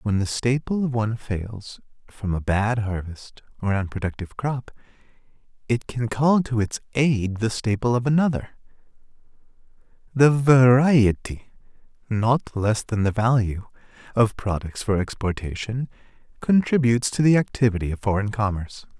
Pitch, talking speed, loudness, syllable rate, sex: 115 Hz, 130 wpm, -22 LUFS, 4.8 syllables/s, male